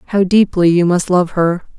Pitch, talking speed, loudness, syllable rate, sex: 180 Hz, 200 wpm, -13 LUFS, 5.0 syllables/s, female